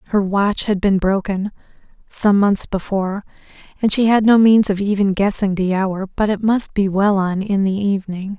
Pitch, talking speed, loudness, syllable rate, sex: 200 Hz, 195 wpm, -17 LUFS, 4.9 syllables/s, female